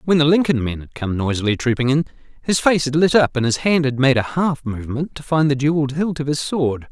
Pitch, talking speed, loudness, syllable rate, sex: 140 Hz, 260 wpm, -18 LUFS, 5.9 syllables/s, male